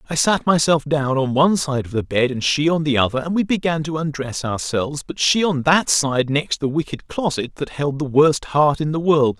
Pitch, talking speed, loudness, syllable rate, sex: 145 Hz, 245 wpm, -19 LUFS, 5.2 syllables/s, male